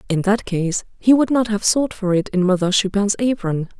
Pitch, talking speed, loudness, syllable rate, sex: 205 Hz, 220 wpm, -18 LUFS, 5.0 syllables/s, female